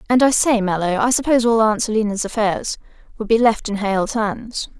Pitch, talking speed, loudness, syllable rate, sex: 220 Hz, 200 wpm, -18 LUFS, 5.6 syllables/s, female